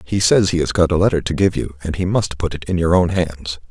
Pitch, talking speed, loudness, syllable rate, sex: 85 Hz, 310 wpm, -18 LUFS, 5.8 syllables/s, male